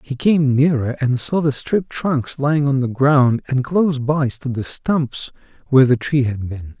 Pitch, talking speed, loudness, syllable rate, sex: 135 Hz, 205 wpm, -18 LUFS, 4.5 syllables/s, male